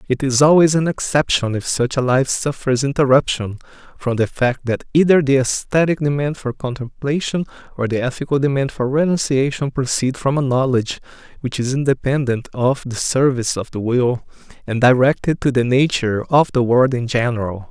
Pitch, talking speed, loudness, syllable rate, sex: 130 Hz, 170 wpm, -18 LUFS, 5.3 syllables/s, male